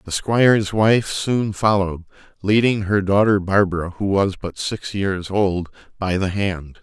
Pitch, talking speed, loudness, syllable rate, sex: 100 Hz, 160 wpm, -19 LUFS, 4.2 syllables/s, male